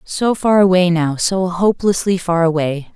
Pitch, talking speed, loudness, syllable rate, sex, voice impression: 180 Hz, 160 wpm, -15 LUFS, 4.6 syllables/s, female, feminine, adult-like, slightly fluent, slightly intellectual, elegant